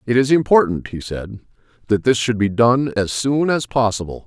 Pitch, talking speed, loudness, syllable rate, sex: 115 Hz, 195 wpm, -18 LUFS, 5.0 syllables/s, male